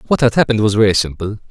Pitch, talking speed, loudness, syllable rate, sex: 110 Hz, 240 wpm, -14 LUFS, 8.0 syllables/s, male